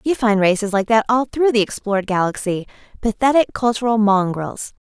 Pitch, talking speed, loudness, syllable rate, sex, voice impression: 215 Hz, 150 wpm, -18 LUFS, 5.5 syllables/s, female, feminine, adult-like, slightly soft, fluent, refreshing, friendly, kind